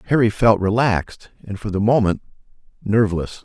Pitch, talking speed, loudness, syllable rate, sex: 105 Hz, 140 wpm, -19 LUFS, 5.6 syllables/s, male